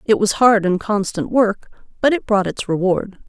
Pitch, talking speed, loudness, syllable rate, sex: 205 Hz, 200 wpm, -18 LUFS, 4.7 syllables/s, female